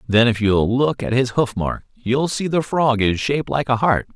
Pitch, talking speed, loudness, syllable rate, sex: 130 Hz, 245 wpm, -19 LUFS, 4.7 syllables/s, male